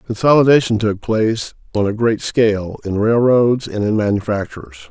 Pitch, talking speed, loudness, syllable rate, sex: 110 Hz, 145 wpm, -16 LUFS, 5.4 syllables/s, male